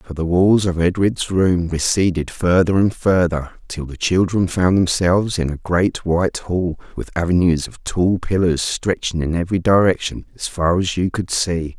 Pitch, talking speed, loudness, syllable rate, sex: 90 Hz, 180 wpm, -18 LUFS, 4.6 syllables/s, male